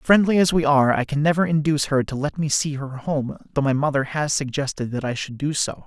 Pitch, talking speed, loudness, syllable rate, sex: 145 Hz, 255 wpm, -21 LUFS, 5.9 syllables/s, male